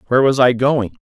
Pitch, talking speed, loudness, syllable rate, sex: 125 Hz, 235 wpm, -15 LUFS, 6.7 syllables/s, male